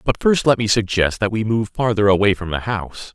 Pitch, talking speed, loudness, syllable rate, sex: 105 Hz, 250 wpm, -18 LUFS, 5.6 syllables/s, male